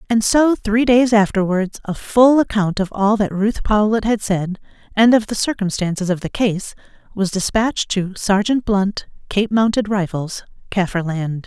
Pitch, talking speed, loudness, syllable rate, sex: 205 Hz, 160 wpm, -18 LUFS, 4.5 syllables/s, female